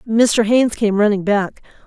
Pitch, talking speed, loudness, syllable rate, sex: 215 Hz, 160 wpm, -16 LUFS, 4.7 syllables/s, female